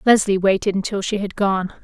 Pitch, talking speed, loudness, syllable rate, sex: 200 Hz, 195 wpm, -19 LUFS, 5.4 syllables/s, female